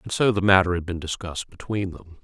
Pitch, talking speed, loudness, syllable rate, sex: 90 Hz, 240 wpm, -23 LUFS, 6.6 syllables/s, male